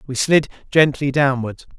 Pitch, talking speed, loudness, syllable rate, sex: 140 Hz, 135 wpm, -18 LUFS, 4.5 syllables/s, male